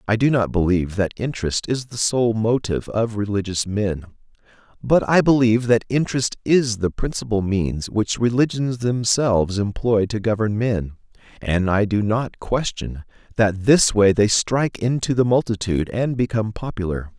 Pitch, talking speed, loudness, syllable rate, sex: 110 Hz, 155 wpm, -20 LUFS, 4.9 syllables/s, male